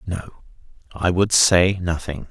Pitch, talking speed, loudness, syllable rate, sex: 90 Hz, 130 wpm, -19 LUFS, 3.7 syllables/s, male